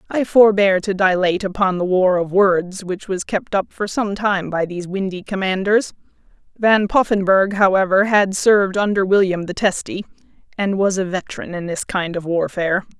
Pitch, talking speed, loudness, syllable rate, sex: 190 Hz, 175 wpm, -18 LUFS, 5.0 syllables/s, female